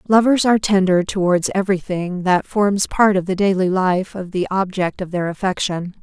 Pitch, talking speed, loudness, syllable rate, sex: 190 Hz, 180 wpm, -18 LUFS, 5.0 syllables/s, female